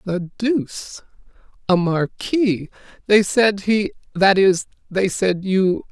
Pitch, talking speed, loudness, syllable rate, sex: 195 Hz, 110 wpm, -19 LUFS, 3.3 syllables/s, female